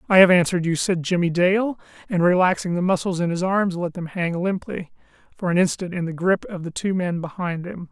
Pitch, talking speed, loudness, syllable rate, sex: 180 Hz, 220 wpm, -21 LUFS, 5.6 syllables/s, male